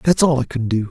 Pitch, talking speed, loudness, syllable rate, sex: 130 Hz, 330 wpm, -18 LUFS, 6.3 syllables/s, male